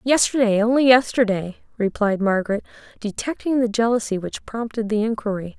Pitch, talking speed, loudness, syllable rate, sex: 220 Hz, 130 wpm, -21 LUFS, 5.4 syllables/s, female